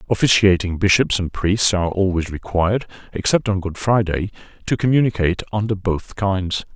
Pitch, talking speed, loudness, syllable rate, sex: 95 Hz, 140 wpm, -19 LUFS, 5.3 syllables/s, male